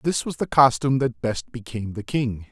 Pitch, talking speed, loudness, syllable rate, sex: 120 Hz, 215 wpm, -23 LUFS, 5.4 syllables/s, male